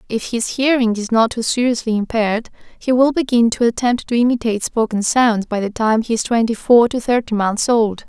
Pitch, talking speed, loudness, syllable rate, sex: 230 Hz, 210 wpm, -17 LUFS, 5.4 syllables/s, female